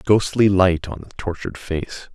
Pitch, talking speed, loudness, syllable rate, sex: 90 Hz, 170 wpm, -20 LUFS, 4.6 syllables/s, male